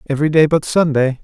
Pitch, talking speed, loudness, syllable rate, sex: 150 Hz, 195 wpm, -15 LUFS, 6.4 syllables/s, male